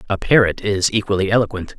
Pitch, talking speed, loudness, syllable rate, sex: 100 Hz, 170 wpm, -17 LUFS, 6.3 syllables/s, male